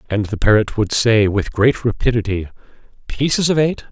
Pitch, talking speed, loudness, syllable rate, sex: 115 Hz, 170 wpm, -17 LUFS, 5.1 syllables/s, male